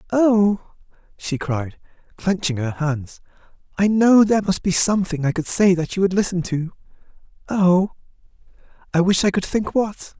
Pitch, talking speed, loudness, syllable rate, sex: 185 Hz, 155 wpm, -19 LUFS, 4.7 syllables/s, male